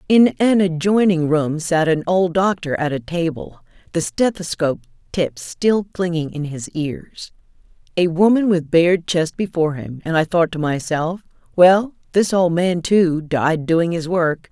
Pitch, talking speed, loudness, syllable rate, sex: 170 Hz, 165 wpm, -18 LUFS, 4.3 syllables/s, female